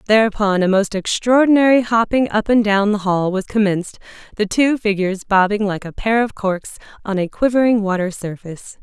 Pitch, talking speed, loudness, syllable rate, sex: 210 Hz, 175 wpm, -17 LUFS, 5.4 syllables/s, female